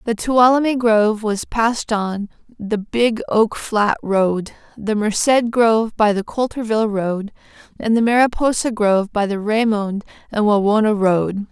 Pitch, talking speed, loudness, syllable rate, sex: 215 Hz, 145 wpm, -18 LUFS, 4.3 syllables/s, female